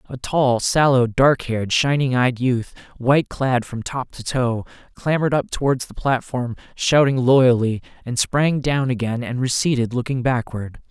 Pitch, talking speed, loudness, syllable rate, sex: 125 Hz, 160 wpm, -20 LUFS, 4.5 syllables/s, male